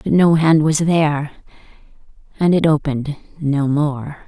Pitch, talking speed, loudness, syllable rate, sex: 150 Hz, 140 wpm, -16 LUFS, 4.5 syllables/s, female